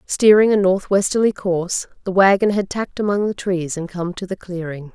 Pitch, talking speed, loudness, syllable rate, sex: 190 Hz, 205 wpm, -18 LUFS, 5.4 syllables/s, female